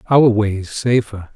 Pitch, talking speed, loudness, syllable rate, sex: 110 Hz, 175 wpm, -16 LUFS, 4.1 syllables/s, male